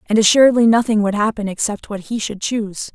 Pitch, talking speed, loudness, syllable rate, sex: 215 Hz, 205 wpm, -16 LUFS, 6.0 syllables/s, female